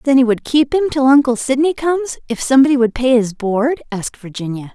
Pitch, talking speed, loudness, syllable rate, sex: 260 Hz, 215 wpm, -15 LUFS, 5.9 syllables/s, female